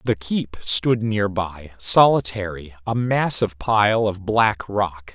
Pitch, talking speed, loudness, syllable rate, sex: 100 Hz, 130 wpm, -20 LUFS, 3.5 syllables/s, male